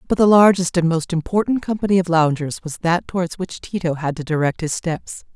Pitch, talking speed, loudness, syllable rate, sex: 170 Hz, 215 wpm, -19 LUFS, 5.5 syllables/s, female